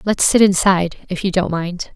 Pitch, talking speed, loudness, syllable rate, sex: 185 Hz, 215 wpm, -16 LUFS, 5.2 syllables/s, female